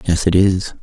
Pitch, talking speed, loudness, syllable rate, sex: 90 Hz, 215 wpm, -15 LUFS, 4.8 syllables/s, male